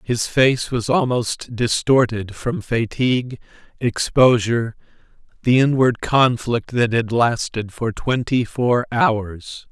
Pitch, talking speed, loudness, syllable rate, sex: 120 Hz, 110 wpm, -19 LUFS, 3.6 syllables/s, male